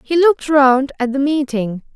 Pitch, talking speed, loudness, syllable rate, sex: 275 Hz, 185 wpm, -16 LUFS, 4.7 syllables/s, female